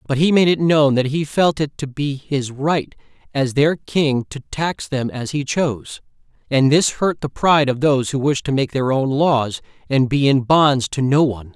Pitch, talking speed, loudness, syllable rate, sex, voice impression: 140 Hz, 225 wpm, -18 LUFS, 4.6 syllables/s, male, very masculine, very adult-like, very thick, very tensed, very powerful, bright, hard, very clear, fluent, very cool, very intellectual, very refreshing, very sincere, calm, slightly mature, very friendly, very reassuring, unique, elegant, slightly wild, very sweet, lively, strict, slightly intense